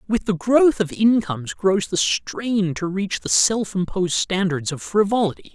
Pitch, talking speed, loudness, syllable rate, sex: 195 Hz, 175 wpm, -20 LUFS, 4.5 syllables/s, male